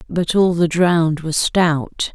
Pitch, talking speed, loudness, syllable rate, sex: 170 Hz, 170 wpm, -17 LUFS, 4.1 syllables/s, female